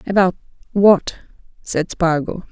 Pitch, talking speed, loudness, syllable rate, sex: 180 Hz, 70 wpm, -17 LUFS, 4.0 syllables/s, female